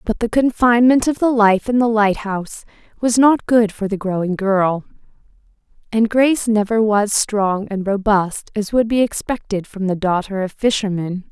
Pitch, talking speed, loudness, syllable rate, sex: 215 Hz, 170 wpm, -17 LUFS, 4.7 syllables/s, female